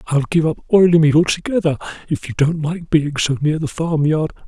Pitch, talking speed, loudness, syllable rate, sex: 155 Hz, 200 wpm, -17 LUFS, 5.5 syllables/s, male